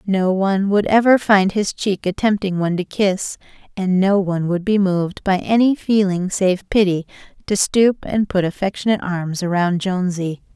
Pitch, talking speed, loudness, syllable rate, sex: 190 Hz, 175 wpm, -18 LUFS, 5.0 syllables/s, female